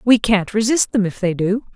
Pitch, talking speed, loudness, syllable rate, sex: 210 Hz, 240 wpm, -17 LUFS, 5.0 syllables/s, female